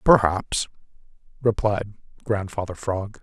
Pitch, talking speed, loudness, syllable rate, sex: 100 Hz, 75 wpm, -24 LUFS, 3.8 syllables/s, male